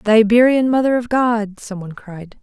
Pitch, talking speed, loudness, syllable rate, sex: 225 Hz, 175 wpm, -15 LUFS, 5.0 syllables/s, female